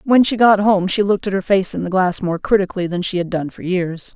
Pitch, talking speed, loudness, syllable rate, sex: 190 Hz, 290 wpm, -17 LUFS, 5.9 syllables/s, female